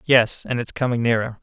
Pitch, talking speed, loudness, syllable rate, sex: 120 Hz, 210 wpm, -21 LUFS, 5.4 syllables/s, male